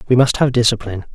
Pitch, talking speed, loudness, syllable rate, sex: 120 Hz, 210 wpm, -15 LUFS, 7.7 syllables/s, male